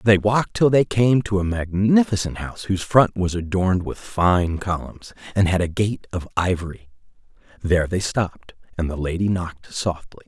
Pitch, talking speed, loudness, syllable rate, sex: 95 Hz, 175 wpm, -21 LUFS, 5.2 syllables/s, male